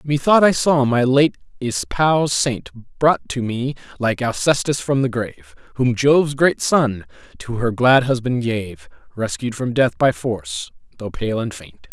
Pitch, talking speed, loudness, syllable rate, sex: 130 Hz, 165 wpm, -19 LUFS, 4.2 syllables/s, male